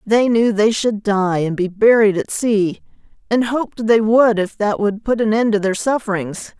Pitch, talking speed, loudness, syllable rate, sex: 215 Hz, 210 wpm, -17 LUFS, 4.5 syllables/s, female